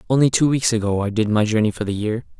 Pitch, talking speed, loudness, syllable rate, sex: 110 Hz, 275 wpm, -19 LUFS, 6.7 syllables/s, male